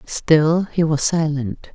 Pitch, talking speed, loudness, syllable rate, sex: 155 Hz, 135 wpm, -18 LUFS, 3.1 syllables/s, female